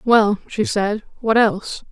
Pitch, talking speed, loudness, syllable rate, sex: 215 Hz, 155 wpm, -19 LUFS, 4.0 syllables/s, female